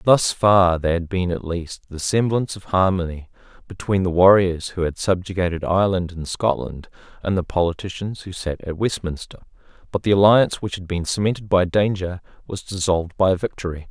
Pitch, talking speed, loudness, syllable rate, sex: 95 Hz, 175 wpm, -20 LUFS, 5.4 syllables/s, male